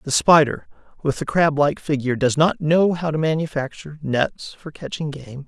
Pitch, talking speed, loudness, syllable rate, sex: 150 Hz, 185 wpm, -20 LUFS, 5.0 syllables/s, male